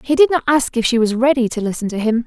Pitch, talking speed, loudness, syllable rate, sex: 245 Hz, 320 wpm, -16 LUFS, 6.6 syllables/s, female